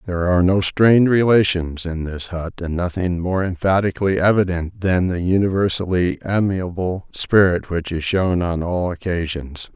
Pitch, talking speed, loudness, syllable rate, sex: 90 Hz, 150 wpm, -19 LUFS, 4.8 syllables/s, male